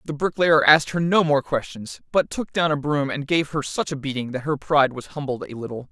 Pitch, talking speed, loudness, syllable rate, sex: 145 Hz, 255 wpm, -22 LUFS, 5.7 syllables/s, male